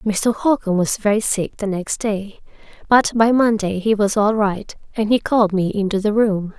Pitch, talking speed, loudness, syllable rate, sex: 210 Hz, 200 wpm, -18 LUFS, 4.8 syllables/s, female